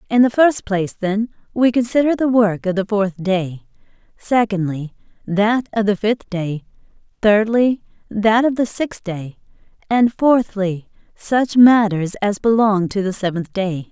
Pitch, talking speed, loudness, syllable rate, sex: 210 Hz, 150 wpm, -17 LUFS, 4.2 syllables/s, female